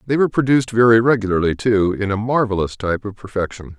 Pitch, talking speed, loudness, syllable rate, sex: 110 Hz, 190 wpm, -18 LUFS, 6.7 syllables/s, male